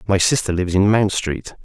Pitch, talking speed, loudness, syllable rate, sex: 95 Hz, 220 wpm, -18 LUFS, 5.7 syllables/s, male